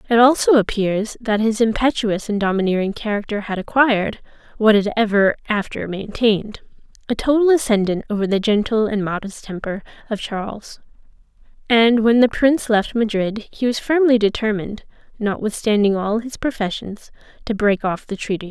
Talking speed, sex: 155 wpm, female